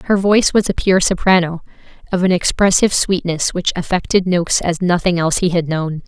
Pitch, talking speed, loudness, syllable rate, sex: 180 Hz, 190 wpm, -15 LUFS, 5.6 syllables/s, female